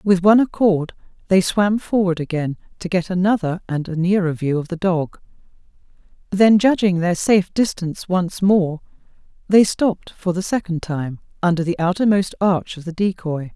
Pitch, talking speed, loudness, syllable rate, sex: 180 Hz, 165 wpm, -19 LUFS, 5.0 syllables/s, female